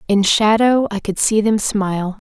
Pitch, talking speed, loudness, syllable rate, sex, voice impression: 210 Hz, 185 wpm, -16 LUFS, 4.5 syllables/s, female, feminine, slightly young, tensed, powerful, bright, slightly soft, slightly raspy, intellectual, friendly, lively, slightly intense